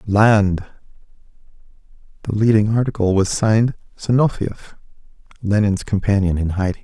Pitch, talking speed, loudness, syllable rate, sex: 105 Hz, 90 wpm, -18 LUFS, 5.1 syllables/s, male